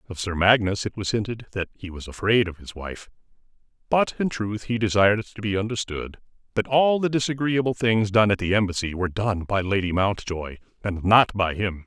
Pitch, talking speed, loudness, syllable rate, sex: 105 Hz, 200 wpm, -23 LUFS, 5.5 syllables/s, male